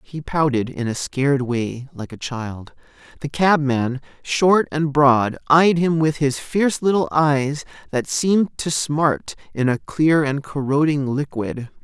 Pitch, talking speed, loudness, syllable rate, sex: 145 Hz, 155 wpm, -19 LUFS, 3.9 syllables/s, male